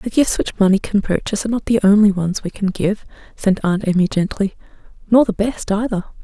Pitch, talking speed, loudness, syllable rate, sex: 205 Hz, 210 wpm, -18 LUFS, 5.8 syllables/s, female